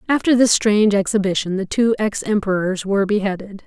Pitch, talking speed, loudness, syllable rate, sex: 205 Hz, 165 wpm, -18 LUFS, 5.8 syllables/s, female